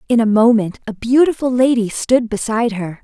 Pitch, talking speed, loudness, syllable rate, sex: 230 Hz, 180 wpm, -15 LUFS, 5.4 syllables/s, female